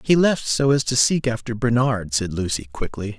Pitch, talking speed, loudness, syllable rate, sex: 115 Hz, 205 wpm, -21 LUFS, 4.9 syllables/s, male